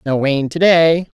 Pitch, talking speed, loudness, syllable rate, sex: 155 Hz, 200 wpm, -14 LUFS, 4.0 syllables/s, female